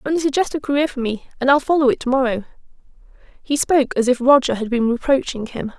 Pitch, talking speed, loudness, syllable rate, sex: 265 Hz, 220 wpm, -18 LUFS, 6.7 syllables/s, female